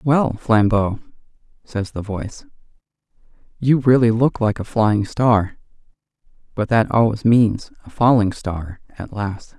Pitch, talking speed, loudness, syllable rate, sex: 110 Hz, 130 wpm, -18 LUFS, 4.0 syllables/s, male